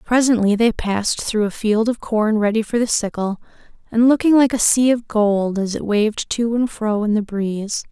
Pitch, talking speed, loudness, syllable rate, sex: 220 Hz, 210 wpm, -18 LUFS, 5.0 syllables/s, female